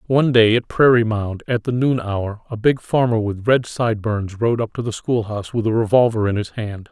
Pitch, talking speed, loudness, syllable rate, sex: 110 Hz, 225 wpm, -19 LUFS, 5.3 syllables/s, male